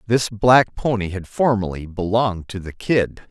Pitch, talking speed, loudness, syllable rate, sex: 105 Hz, 165 wpm, -20 LUFS, 4.5 syllables/s, male